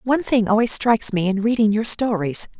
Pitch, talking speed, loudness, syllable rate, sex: 220 Hz, 210 wpm, -18 LUFS, 5.8 syllables/s, female